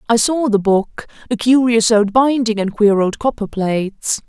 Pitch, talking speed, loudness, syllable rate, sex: 225 Hz, 170 wpm, -16 LUFS, 4.5 syllables/s, female